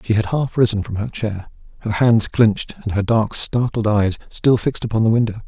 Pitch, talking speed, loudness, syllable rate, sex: 110 Hz, 220 wpm, -19 LUFS, 5.4 syllables/s, male